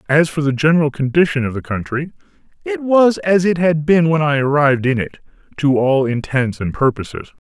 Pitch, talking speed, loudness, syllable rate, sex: 145 Hz, 195 wpm, -16 LUFS, 5.4 syllables/s, male